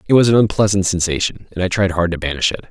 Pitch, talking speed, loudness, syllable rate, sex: 95 Hz, 265 wpm, -17 LUFS, 7.0 syllables/s, male